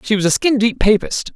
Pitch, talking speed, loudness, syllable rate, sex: 215 Hz, 265 wpm, -16 LUFS, 5.6 syllables/s, female